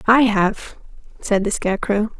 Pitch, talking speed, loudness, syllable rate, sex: 210 Hz, 135 wpm, -19 LUFS, 4.5 syllables/s, female